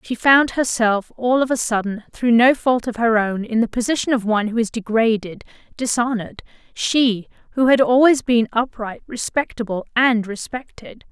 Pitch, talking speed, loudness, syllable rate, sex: 235 Hz, 165 wpm, -18 LUFS, 4.9 syllables/s, female